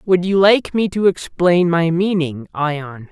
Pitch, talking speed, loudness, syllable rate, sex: 175 Hz, 175 wpm, -16 LUFS, 3.7 syllables/s, male